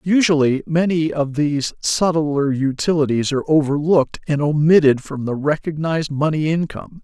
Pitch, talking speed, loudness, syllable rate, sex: 150 Hz, 130 wpm, -18 LUFS, 5.2 syllables/s, male